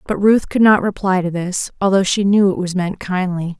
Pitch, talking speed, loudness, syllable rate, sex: 190 Hz, 235 wpm, -16 LUFS, 5.1 syllables/s, female